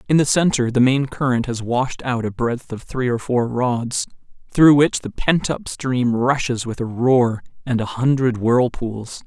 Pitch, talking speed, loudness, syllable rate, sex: 125 Hz, 195 wpm, -19 LUFS, 4.2 syllables/s, male